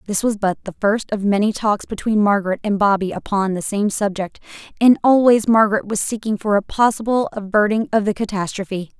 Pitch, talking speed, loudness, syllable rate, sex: 205 Hz, 185 wpm, -18 LUFS, 5.6 syllables/s, female